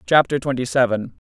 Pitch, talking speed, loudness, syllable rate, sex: 130 Hz, 145 wpm, -20 LUFS, 5.2 syllables/s, male